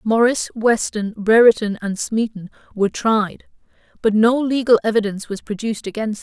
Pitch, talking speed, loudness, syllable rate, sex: 220 Hz, 145 wpm, -18 LUFS, 5.3 syllables/s, female